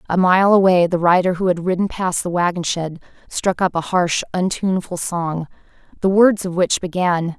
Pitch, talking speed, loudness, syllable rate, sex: 180 Hz, 185 wpm, -18 LUFS, 4.9 syllables/s, female